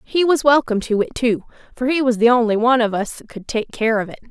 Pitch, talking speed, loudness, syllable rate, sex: 240 Hz, 280 wpm, -18 LUFS, 6.4 syllables/s, female